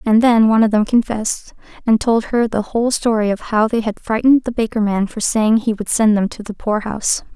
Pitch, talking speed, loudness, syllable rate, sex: 220 Hz, 245 wpm, -17 LUFS, 5.7 syllables/s, female